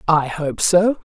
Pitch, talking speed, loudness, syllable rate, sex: 175 Hz, 160 wpm, -17 LUFS, 3.5 syllables/s, female